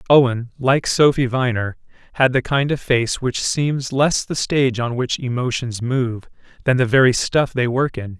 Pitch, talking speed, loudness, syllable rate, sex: 125 Hz, 185 wpm, -19 LUFS, 4.5 syllables/s, male